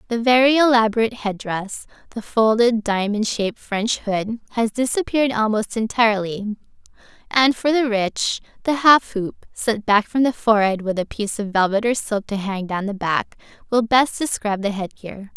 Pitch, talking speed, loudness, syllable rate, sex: 220 Hz, 175 wpm, -20 LUFS, 5.0 syllables/s, female